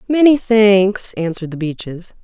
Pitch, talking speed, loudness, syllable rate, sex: 200 Hz, 135 wpm, -15 LUFS, 4.5 syllables/s, female